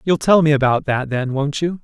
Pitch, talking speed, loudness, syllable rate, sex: 145 Hz, 230 wpm, -17 LUFS, 5.3 syllables/s, male